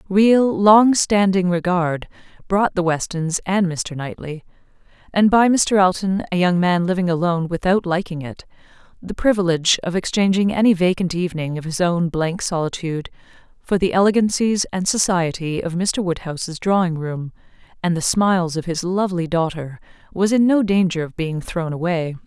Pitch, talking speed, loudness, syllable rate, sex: 180 Hz, 155 wpm, -19 LUFS, 5.0 syllables/s, female